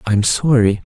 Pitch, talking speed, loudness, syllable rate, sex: 115 Hz, 200 wpm, -15 LUFS, 5.6 syllables/s, male